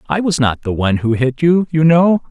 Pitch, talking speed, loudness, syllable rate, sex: 150 Hz, 260 wpm, -14 LUFS, 5.2 syllables/s, male